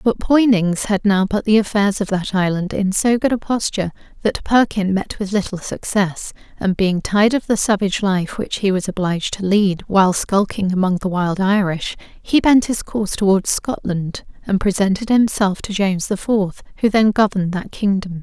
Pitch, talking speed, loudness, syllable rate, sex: 200 Hz, 190 wpm, -18 LUFS, 5.0 syllables/s, female